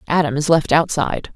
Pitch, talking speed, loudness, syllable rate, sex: 155 Hz, 175 wpm, -17 LUFS, 5.9 syllables/s, female